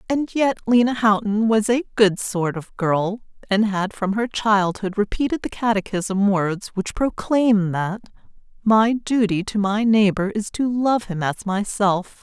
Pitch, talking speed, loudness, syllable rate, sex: 210 Hz, 160 wpm, -20 LUFS, 4.0 syllables/s, female